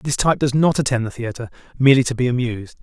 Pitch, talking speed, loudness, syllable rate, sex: 125 Hz, 235 wpm, -18 LUFS, 7.3 syllables/s, male